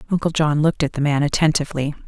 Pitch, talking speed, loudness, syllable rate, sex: 150 Hz, 205 wpm, -19 LUFS, 7.4 syllables/s, female